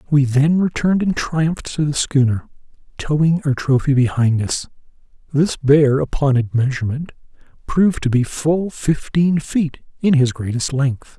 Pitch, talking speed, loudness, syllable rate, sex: 145 Hz, 145 wpm, -18 LUFS, 4.5 syllables/s, male